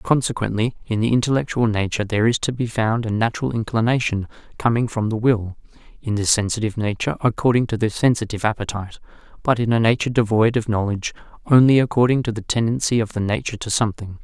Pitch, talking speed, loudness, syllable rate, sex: 115 Hz, 180 wpm, -20 LUFS, 6.8 syllables/s, male